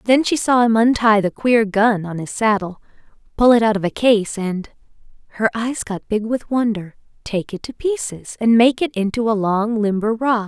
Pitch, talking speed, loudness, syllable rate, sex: 220 Hz, 195 wpm, -18 LUFS, 4.8 syllables/s, female